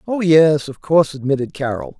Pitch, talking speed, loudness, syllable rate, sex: 150 Hz, 180 wpm, -16 LUFS, 5.4 syllables/s, male